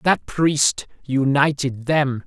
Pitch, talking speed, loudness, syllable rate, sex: 135 Hz, 105 wpm, -19 LUFS, 2.9 syllables/s, male